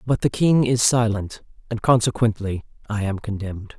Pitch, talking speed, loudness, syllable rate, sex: 110 Hz, 160 wpm, -21 LUFS, 5.1 syllables/s, female